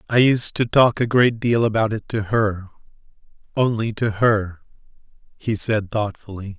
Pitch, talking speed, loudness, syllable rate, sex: 110 Hz, 155 wpm, -20 LUFS, 4.4 syllables/s, male